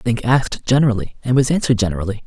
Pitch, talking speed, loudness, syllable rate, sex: 115 Hz, 185 wpm, -18 LUFS, 7.8 syllables/s, male